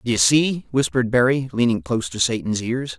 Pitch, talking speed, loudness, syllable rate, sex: 120 Hz, 180 wpm, -20 LUFS, 5.3 syllables/s, male